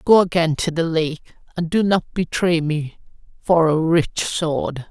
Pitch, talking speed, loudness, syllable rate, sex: 165 Hz, 170 wpm, -19 LUFS, 3.9 syllables/s, female